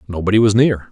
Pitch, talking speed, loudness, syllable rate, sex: 105 Hz, 195 wpm, -15 LUFS, 6.7 syllables/s, male